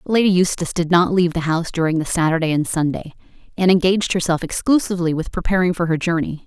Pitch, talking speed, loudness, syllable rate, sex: 175 Hz, 195 wpm, -18 LUFS, 6.7 syllables/s, female